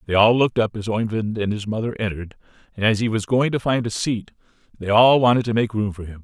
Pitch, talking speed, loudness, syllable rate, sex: 110 Hz, 260 wpm, -20 LUFS, 6.3 syllables/s, male